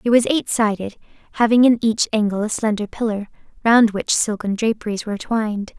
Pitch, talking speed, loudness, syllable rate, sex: 220 Hz, 175 wpm, -19 LUFS, 5.5 syllables/s, female